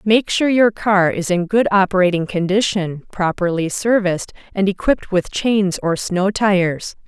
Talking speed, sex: 155 wpm, female